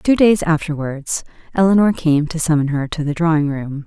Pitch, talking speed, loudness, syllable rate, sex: 160 Hz, 185 wpm, -17 LUFS, 5.1 syllables/s, female